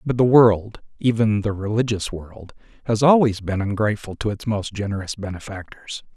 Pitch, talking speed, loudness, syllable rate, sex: 105 Hz, 155 wpm, -20 LUFS, 5.1 syllables/s, male